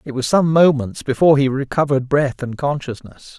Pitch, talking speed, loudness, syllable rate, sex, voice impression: 140 Hz, 175 wpm, -17 LUFS, 5.5 syllables/s, male, masculine, very adult-like, slightly thick, cool, sincere, slightly calm, elegant